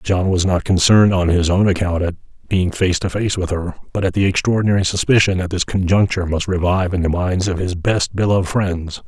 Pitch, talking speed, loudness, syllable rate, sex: 90 Hz, 220 wpm, -17 LUFS, 5.8 syllables/s, male